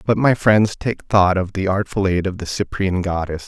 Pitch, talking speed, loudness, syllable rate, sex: 95 Hz, 225 wpm, -19 LUFS, 4.8 syllables/s, male